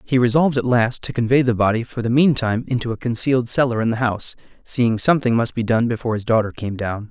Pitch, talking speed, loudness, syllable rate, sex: 120 Hz, 235 wpm, -19 LUFS, 6.6 syllables/s, male